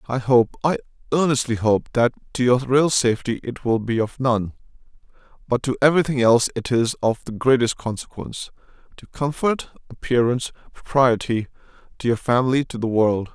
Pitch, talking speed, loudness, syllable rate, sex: 125 Hz, 155 wpm, -21 LUFS, 5.4 syllables/s, male